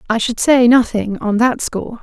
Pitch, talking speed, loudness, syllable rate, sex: 230 Hz, 180 wpm, -15 LUFS, 4.9 syllables/s, female